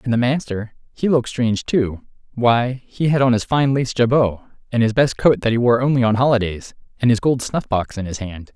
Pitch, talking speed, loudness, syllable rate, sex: 120 Hz, 225 wpm, -18 LUFS, 5.5 syllables/s, male